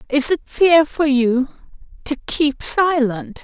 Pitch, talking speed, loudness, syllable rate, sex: 275 Hz, 140 wpm, -17 LUFS, 3.5 syllables/s, female